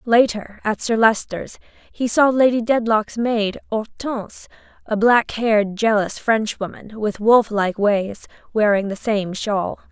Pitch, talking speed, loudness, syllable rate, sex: 220 Hz, 135 wpm, -19 LUFS, 4.1 syllables/s, female